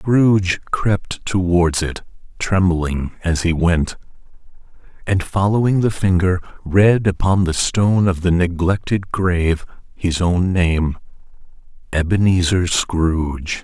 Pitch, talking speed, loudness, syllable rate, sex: 90 Hz, 110 wpm, -18 LUFS, 3.8 syllables/s, male